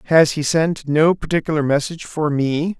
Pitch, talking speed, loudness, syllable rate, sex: 155 Hz, 170 wpm, -18 LUFS, 5.0 syllables/s, male